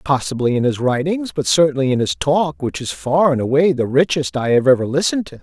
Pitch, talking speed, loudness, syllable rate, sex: 145 Hz, 220 wpm, -17 LUFS, 5.6 syllables/s, female